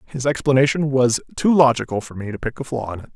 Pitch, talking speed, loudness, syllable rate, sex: 130 Hz, 245 wpm, -19 LUFS, 6.2 syllables/s, male